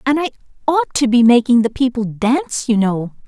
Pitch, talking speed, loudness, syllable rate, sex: 240 Hz, 200 wpm, -16 LUFS, 5.5 syllables/s, female